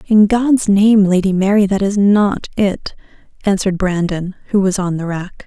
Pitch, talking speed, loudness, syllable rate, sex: 195 Hz, 175 wpm, -15 LUFS, 4.6 syllables/s, female